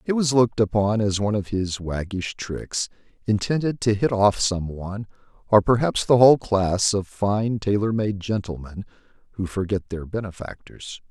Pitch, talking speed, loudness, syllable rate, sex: 105 Hz, 160 wpm, -22 LUFS, 4.8 syllables/s, male